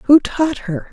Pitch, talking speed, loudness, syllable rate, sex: 255 Hz, 195 wpm, -16 LUFS, 3.5 syllables/s, female